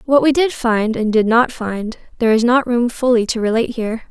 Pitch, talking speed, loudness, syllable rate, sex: 235 Hz, 235 wpm, -16 LUFS, 5.7 syllables/s, female